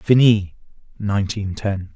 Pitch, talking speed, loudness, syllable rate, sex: 100 Hz, 90 wpm, -20 LUFS, 4.2 syllables/s, male